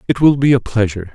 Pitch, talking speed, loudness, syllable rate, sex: 120 Hz, 260 wpm, -15 LUFS, 7.2 syllables/s, male